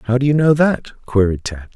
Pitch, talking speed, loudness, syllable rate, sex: 125 Hz, 240 wpm, -16 LUFS, 5.2 syllables/s, male